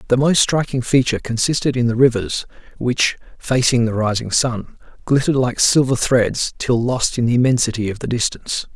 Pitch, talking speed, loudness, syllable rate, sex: 120 Hz, 170 wpm, -17 LUFS, 5.4 syllables/s, male